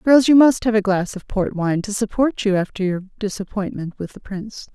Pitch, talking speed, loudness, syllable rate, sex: 205 Hz, 230 wpm, -20 LUFS, 5.5 syllables/s, female